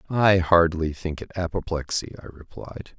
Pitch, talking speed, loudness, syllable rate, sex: 85 Hz, 140 wpm, -23 LUFS, 4.5 syllables/s, male